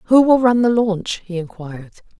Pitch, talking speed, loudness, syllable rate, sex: 205 Hz, 190 wpm, -16 LUFS, 5.3 syllables/s, female